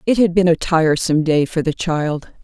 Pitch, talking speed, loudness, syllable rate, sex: 165 Hz, 220 wpm, -17 LUFS, 5.4 syllables/s, female